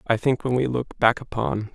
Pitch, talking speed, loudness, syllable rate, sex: 120 Hz, 240 wpm, -23 LUFS, 5.0 syllables/s, male